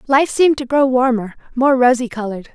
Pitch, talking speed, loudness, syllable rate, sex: 255 Hz, 190 wpm, -16 LUFS, 5.9 syllables/s, female